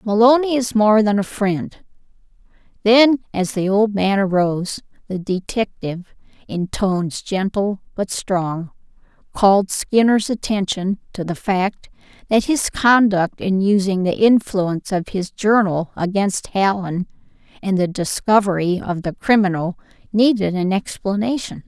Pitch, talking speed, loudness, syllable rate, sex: 200 Hz, 125 wpm, -18 LUFS, 4.1 syllables/s, female